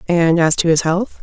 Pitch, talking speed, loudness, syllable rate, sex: 170 Hz, 245 wpm, -15 LUFS, 4.8 syllables/s, female